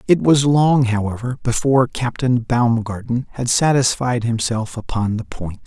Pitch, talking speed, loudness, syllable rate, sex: 120 Hz, 140 wpm, -18 LUFS, 4.5 syllables/s, male